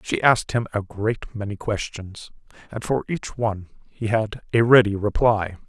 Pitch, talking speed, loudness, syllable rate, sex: 110 Hz, 170 wpm, -22 LUFS, 4.6 syllables/s, male